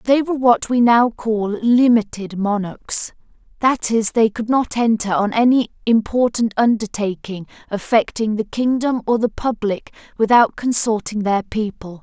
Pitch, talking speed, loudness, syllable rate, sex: 225 Hz, 140 wpm, -18 LUFS, 4.4 syllables/s, female